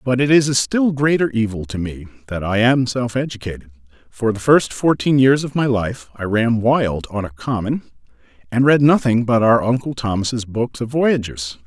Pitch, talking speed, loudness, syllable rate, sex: 120 Hz, 195 wpm, -18 LUFS, 4.8 syllables/s, male